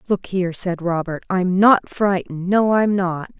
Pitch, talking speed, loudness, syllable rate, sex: 185 Hz, 160 wpm, -19 LUFS, 4.5 syllables/s, female